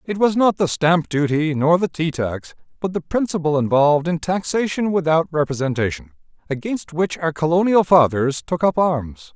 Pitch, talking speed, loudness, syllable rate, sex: 160 Hz, 165 wpm, -19 LUFS, 4.9 syllables/s, male